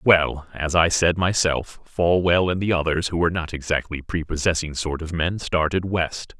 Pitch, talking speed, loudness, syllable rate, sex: 85 Hz, 180 wpm, -22 LUFS, 4.7 syllables/s, male